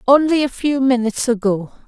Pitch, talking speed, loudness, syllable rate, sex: 250 Hz, 160 wpm, -17 LUFS, 5.5 syllables/s, female